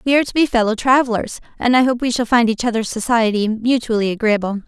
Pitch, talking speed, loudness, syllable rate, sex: 235 Hz, 220 wpm, -17 LUFS, 6.5 syllables/s, female